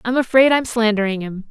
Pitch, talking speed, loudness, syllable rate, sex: 230 Hz, 200 wpm, -17 LUFS, 5.7 syllables/s, female